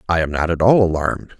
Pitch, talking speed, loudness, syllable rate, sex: 90 Hz, 260 wpm, -17 LUFS, 6.6 syllables/s, male